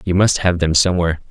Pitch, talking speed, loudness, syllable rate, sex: 90 Hz, 230 wpm, -16 LUFS, 7.0 syllables/s, male